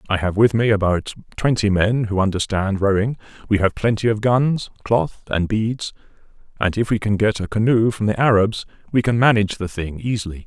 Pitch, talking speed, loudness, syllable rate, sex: 105 Hz, 195 wpm, -19 LUFS, 5.3 syllables/s, male